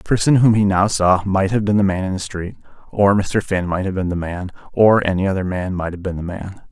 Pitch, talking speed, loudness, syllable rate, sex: 95 Hz, 275 wpm, -18 LUFS, 5.6 syllables/s, male